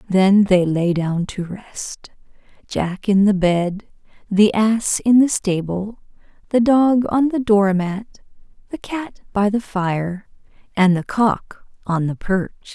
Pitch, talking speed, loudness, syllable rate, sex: 200 Hz, 145 wpm, -18 LUFS, 3.5 syllables/s, female